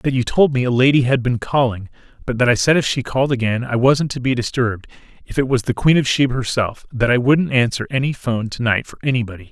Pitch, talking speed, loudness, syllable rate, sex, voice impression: 125 Hz, 245 wpm, -18 LUFS, 6.3 syllables/s, male, very masculine, very middle-aged, very thick, tensed, powerful, slightly dark, slightly hard, muffled, fluent, very cool, very intellectual, sincere, very calm, very mature, very friendly, very reassuring, very unique, elegant, very wild, sweet, slightly lively, kind, slightly modest